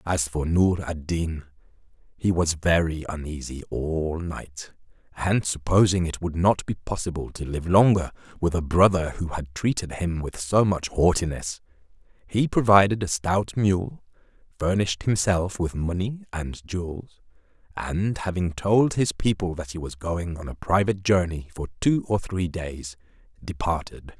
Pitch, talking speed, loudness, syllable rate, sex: 90 Hz, 155 wpm, -24 LUFS, 4.4 syllables/s, male